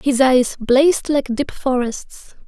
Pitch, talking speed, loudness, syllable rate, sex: 265 Hz, 145 wpm, -17 LUFS, 3.5 syllables/s, female